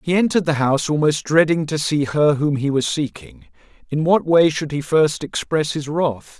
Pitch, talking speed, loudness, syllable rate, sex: 150 Hz, 205 wpm, -19 LUFS, 5.0 syllables/s, male